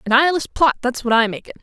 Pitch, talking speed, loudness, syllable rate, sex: 260 Hz, 260 wpm, -18 LUFS, 7.4 syllables/s, female